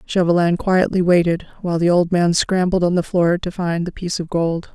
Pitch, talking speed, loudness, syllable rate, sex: 175 Hz, 215 wpm, -18 LUFS, 5.4 syllables/s, female